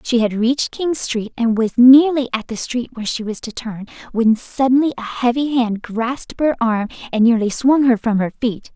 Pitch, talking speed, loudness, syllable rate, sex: 240 Hz, 210 wpm, -17 LUFS, 5.0 syllables/s, female